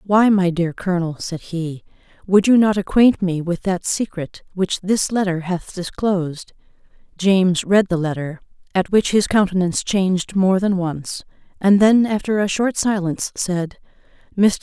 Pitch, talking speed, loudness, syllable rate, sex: 190 Hz, 160 wpm, -19 LUFS, 4.6 syllables/s, female